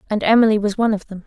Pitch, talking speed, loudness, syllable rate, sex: 210 Hz, 285 wpm, -17 LUFS, 8.4 syllables/s, female